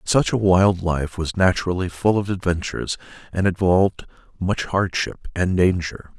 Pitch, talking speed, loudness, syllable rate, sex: 90 Hz, 145 wpm, -21 LUFS, 4.7 syllables/s, male